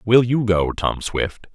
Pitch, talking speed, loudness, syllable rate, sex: 105 Hz, 195 wpm, -20 LUFS, 3.7 syllables/s, male